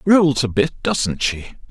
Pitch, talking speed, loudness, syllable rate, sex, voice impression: 140 Hz, 175 wpm, -18 LUFS, 3.4 syllables/s, male, masculine, adult-like, tensed, slightly bright, clear, fluent, cool, intellectual, sincere, calm, slightly friendly, slightly reassuring, slightly wild, lively, slightly kind